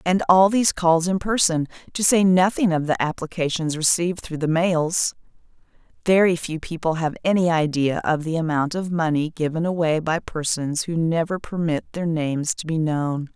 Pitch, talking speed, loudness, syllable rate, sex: 165 Hz, 175 wpm, -21 LUFS, 4.9 syllables/s, female